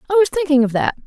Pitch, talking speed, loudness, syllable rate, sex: 295 Hz, 280 wpm, -17 LUFS, 7.6 syllables/s, female